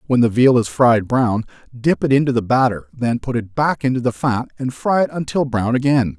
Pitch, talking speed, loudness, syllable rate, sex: 125 Hz, 235 wpm, -18 LUFS, 5.2 syllables/s, male